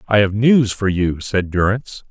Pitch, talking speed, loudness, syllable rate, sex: 105 Hz, 200 wpm, -17 LUFS, 4.7 syllables/s, male